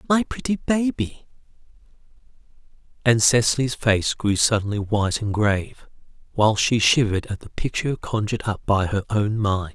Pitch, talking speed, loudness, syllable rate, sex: 115 Hz, 140 wpm, -21 LUFS, 5.1 syllables/s, male